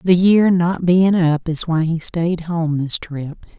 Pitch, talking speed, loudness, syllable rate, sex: 170 Hz, 200 wpm, -17 LUFS, 3.5 syllables/s, female